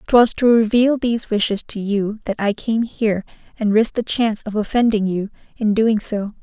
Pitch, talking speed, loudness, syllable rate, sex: 215 Hz, 195 wpm, -19 LUFS, 5.3 syllables/s, female